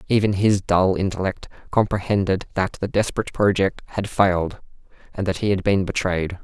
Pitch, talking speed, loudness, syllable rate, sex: 95 Hz, 160 wpm, -21 LUFS, 5.5 syllables/s, male